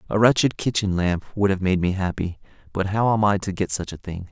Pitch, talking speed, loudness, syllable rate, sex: 95 Hz, 250 wpm, -22 LUFS, 5.7 syllables/s, male